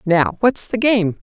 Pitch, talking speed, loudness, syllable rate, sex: 210 Hz, 190 wpm, -17 LUFS, 3.7 syllables/s, female